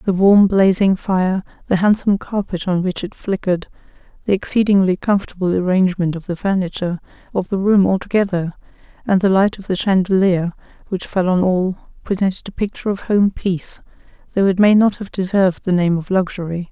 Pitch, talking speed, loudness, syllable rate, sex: 190 Hz, 170 wpm, -17 LUFS, 5.7 syllables/s, female